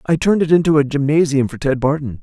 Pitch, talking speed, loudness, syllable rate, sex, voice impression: 145 Hz, 245 wpm, -16 LUFS, 6.6 syllables/s, male, masculine, adult-like, slightly relaxed, slightly weak, slightly bright, soft, cool, calm, friendly, reassuring, wild, kind